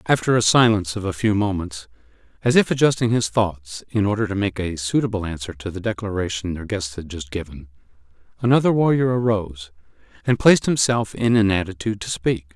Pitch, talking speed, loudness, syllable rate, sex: 100 Hz, 180 wpm, -20 LUFS, 5.8 syllables/s, male